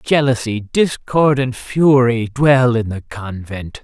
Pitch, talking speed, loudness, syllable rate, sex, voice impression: 125 Hz, 125 wpm, -16 LUFS, 3.6 syllables/s, male, masculine, slightly middle-aged, slightly relaxed, slightly weak, soft, slightly muffled, slightly sincere, calm, slightly mature, kind, modest